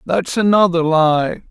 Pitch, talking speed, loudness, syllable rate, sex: 175 Hz, 120 wpm, -15 LUFS, 3.7 syllables/s, male